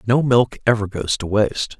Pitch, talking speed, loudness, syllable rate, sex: 110 Hz, 200 wpm, -19 LUFS, 5.0 syllables/s, male